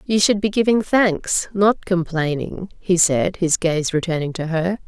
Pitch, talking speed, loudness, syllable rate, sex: 180 Hz, 170 wpm, -19 LUFS, 4.1 syllables/s, female